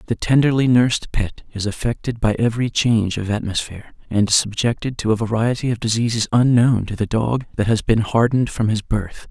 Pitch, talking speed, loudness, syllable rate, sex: 115 Hz, 185 wpm, -19 LUFS, 5.6 syllables/s, male